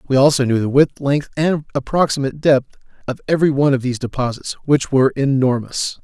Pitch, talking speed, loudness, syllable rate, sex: 135 Hz, 180 wpm, -17 LUFS, 6.2 syllables/s, male